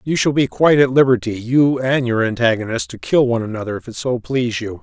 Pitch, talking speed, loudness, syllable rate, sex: 125 Hz, 210 wpm, -17 LUFS, 6.1 syllables/s, male